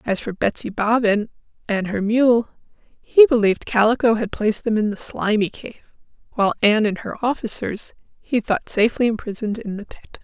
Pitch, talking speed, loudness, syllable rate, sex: 220 Hz, 170 wpm, -20 LUFS, 5.3 syllables/s, female